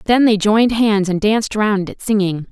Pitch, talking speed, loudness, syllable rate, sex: 210 Hz, 215 wpm, -15 LUFS, 5.1 syllables/s, female